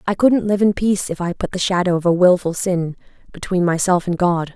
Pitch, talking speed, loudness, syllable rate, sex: 180 Hz, 235 wpm, -18 LUFS, 5.7 syllables/s, female